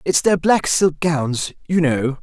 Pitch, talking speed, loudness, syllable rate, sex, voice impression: 160 Hz, 190 wpm, -18 LUFS, 3.5 syllables/s, male, masculine, slightly young, adult-like, slightly thick, tensed, slightly powerful, bright, slightly soft, very clear, fluent, very cool, intellectual, very refreshing, sincere, calm, friendly, reassuring, slightly unique, slightly wild, sweet, very lively, very kind